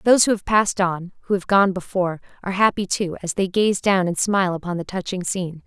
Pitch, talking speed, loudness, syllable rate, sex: 190 Hz, 235 wpm, -21 LUFS, 6.3 syllables/s, female